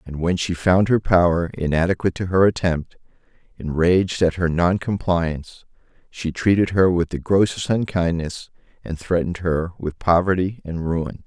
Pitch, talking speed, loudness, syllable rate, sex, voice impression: 90 Hz, 155 wpm, -20 LUFS, 4.9 syllables/s, male, masculine, middle-aged, thick, dark, slightly hard, sincere, calm, mature, slightly reassuring, wild, slightly kind, strict